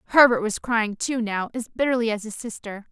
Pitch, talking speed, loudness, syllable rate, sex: 225 Hz, 205 wpm, -23 LUFS, 5.6 syllables/s, female